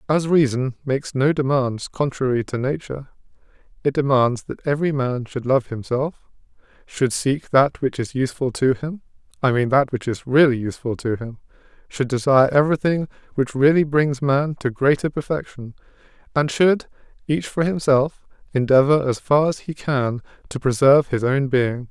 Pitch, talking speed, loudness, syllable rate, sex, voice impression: 135 Hz, 160 wpm, -20 LUFS, 5.0 syllables/s, male, masculine, very adult-like, slightly thick, slightly cool, slightly refreshing, sincere, calm